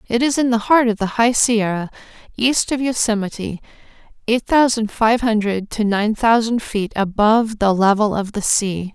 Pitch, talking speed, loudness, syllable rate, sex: 220 Hz, 175 wpm, -17 LUFS, 4.7 syllables/s, female